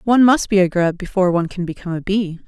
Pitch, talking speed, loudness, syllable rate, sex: 190 Hz, 265 wpm, -18 LUFS, 7.3 syllables/s, female